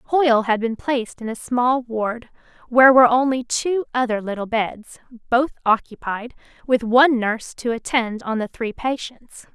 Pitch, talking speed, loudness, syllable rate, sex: 240 Hz, 165 wpm, -20 LUFS, 4.7 syllables/s, female